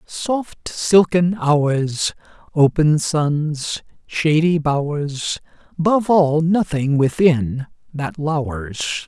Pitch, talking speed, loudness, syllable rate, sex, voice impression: 155 Hz, 85 wpm, -18 LUFS, 2.6 syllables/s, male, masculine, slightly old, powerful, slightly soft, raspy, mature, friendly, slightly wild, lively, slightly strict